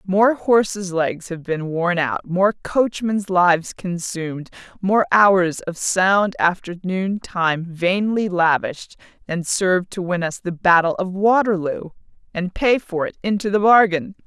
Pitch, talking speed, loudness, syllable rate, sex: 185 Hz, 145 wpm, -19 LUFS, 4.0 syllables/s, female